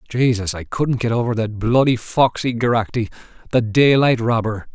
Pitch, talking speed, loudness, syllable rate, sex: 115 Hz, 150 wpm, -18 LUFS, 4.9 syllables/s, male